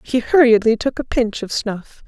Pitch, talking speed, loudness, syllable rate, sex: 230 Hz, 200 wpm, -17 LUFS, 4.6 syllables/s, female